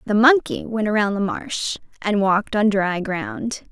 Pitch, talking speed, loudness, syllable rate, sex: 205 Hz, 180 wpm, -20 LUFS, 4.2 syllables/s, female